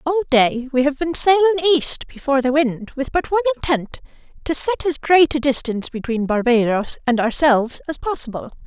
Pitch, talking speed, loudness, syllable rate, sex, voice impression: 285 Hz, 175 wpm, -18 LUFS, 5.4 syllables/s, female, feminine, adult-like, slightly soft, slightly intellectual, slightly sweet, slightly strict